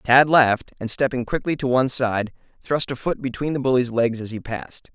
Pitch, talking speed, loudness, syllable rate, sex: 125 Hz, 220 wpm, -21 LUFS, 5.6 syllables/s, male